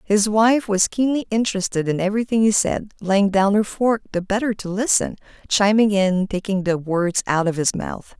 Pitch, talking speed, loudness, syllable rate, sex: 205 Hz, 190 wpm, -20 LUFS, 5.0 syllables/s, female